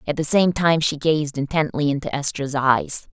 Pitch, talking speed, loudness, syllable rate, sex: 150 Hz, 190 wpm, -20 LUFS, 4.7 syllables/s, female